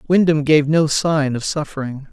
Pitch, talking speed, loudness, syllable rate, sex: 150 Hz, 170 wpm, -17 LUFS, 4.7 syllables/s, male